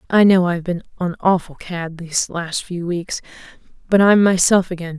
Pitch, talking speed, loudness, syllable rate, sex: 180 Hz, 180 wpm, -18 LUFS, 5.1 syllables/s, female